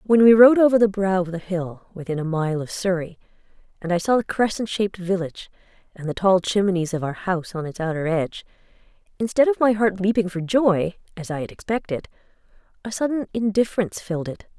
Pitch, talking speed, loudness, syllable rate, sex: 190 Hz, 195 wpm, -21 LUFS, 6.0 syllables/s, female